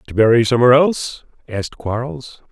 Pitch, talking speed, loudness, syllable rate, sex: 120 Hz, 145 wpm, -16 LUFS, 6.3 syllables/s, male